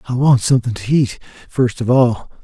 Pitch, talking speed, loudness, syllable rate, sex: 120 Hz, 195 wpm, -16 LUFS, 5.4 syllables/s, male